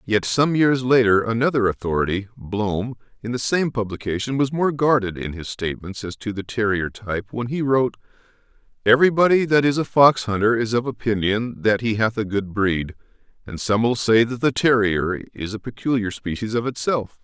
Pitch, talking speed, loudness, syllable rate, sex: 115 Hz, 180 wpm, -21 LUFS, 5.3 syllables/s, male